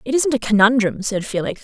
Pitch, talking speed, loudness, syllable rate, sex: 230 Hz, 220 wpm, -18 LUFS, 5.9 syllables/s, female